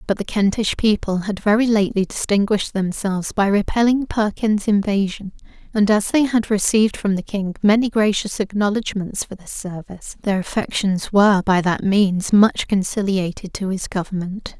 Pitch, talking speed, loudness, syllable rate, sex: 200 Hz, 155 wpm, -19 LUFS, 5.1 syllables/s, female